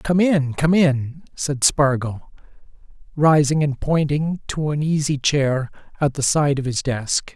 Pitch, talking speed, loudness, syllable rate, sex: 145 Hz, 155 wpm, -20 LUFS, 3.8 syllables/s, male